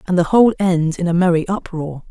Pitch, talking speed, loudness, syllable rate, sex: 175 Hz, 230 wpm, -16 LUFS, 5.8 syllables/s, female